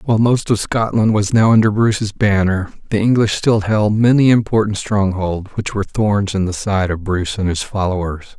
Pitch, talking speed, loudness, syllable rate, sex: 105 Hz, 195 wpm, -16 LUFS, 5.1 syllables/s, male